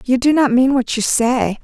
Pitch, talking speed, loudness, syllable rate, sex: 250 Hz, 255 wpm, -15 LUFS, 4.6 syllables/s, female